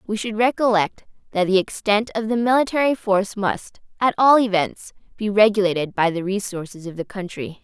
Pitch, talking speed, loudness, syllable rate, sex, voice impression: 205 Hz, 175 wpm, -20 LUFS, 5.4 syllables/s, female, feminine, slightly young, slightly fluent, slightly intellectual, slightly unique